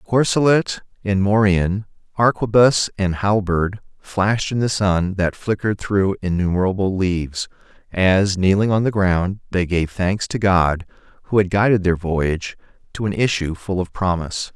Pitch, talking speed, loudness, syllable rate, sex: 95 Hz, 150 wpm, -19 LUFS, 4.6 syllables/s, male